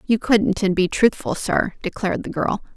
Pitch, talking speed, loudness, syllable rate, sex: 200 Hz, 195 wpm, -20 LUFS, 4.8 syllables/s, female